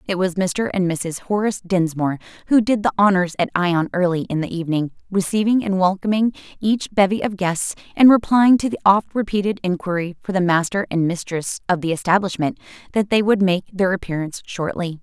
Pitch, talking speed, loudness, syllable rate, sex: 190 Hz, 185 wpm, -19 LUFS, 5.6 syllables/s, female